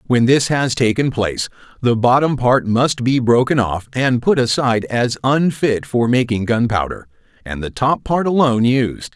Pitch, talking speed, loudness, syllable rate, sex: 125 Hz, 170 wpm, -16 LUFS, 4.6 syllables/s, male